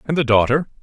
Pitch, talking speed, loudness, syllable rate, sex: 135 Hz, 220 wpm, -17 LUFS, 6.5 syllables/s, male